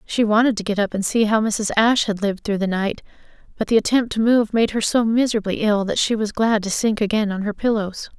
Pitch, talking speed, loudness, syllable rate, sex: 215 Hz, 255 wpm, -19 LUFS, 5.9 syllables/s, female